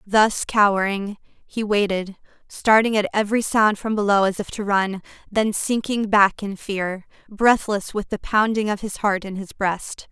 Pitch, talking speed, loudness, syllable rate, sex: 205 Hz, 170 wpm, -21 LUFS, 4.3 syllables/s, female